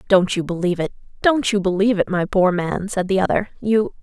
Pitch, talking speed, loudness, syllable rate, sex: 195 Hz, 225 wpm, -19 LUFS, 5.9 syllables/s, female